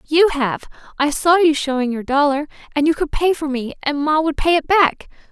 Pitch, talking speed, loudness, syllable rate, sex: 300 Hz, 225 wpm, -18 LUFS, 5.2 syllables/s, female